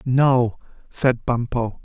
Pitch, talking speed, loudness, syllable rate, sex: 125 Hz, 100 wpm, -20 LUFS, 2.8 syllables/s, male